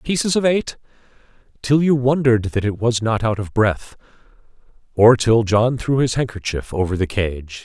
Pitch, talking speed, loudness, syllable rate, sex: 115 Hz, 175 wpm, -18 LUFS, 4.9 syllables/s, male